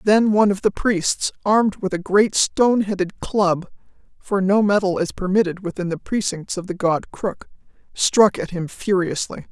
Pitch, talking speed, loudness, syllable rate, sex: 190 Hz, 165 wpm, -20 LUFS, 4.8 syllables/s, female